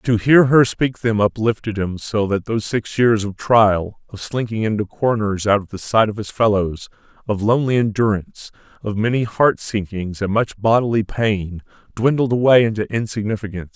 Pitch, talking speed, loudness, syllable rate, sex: 110 Hz, 175 wpm, -18 LUFS, 5.1 syllables/s, male